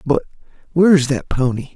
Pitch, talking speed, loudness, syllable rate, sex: 145 Hz, 170 wpm, -17 LUFS, 6.2 syllables/s, male